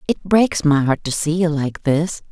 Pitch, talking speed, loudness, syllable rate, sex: 160 Hz, 235 wpm, -18 LUFS, 4.3 syllables/s, female